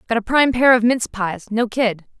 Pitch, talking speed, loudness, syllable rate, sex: 230 Hz, 220 wpm, -17 LUFS, 5.8 syllables/s, female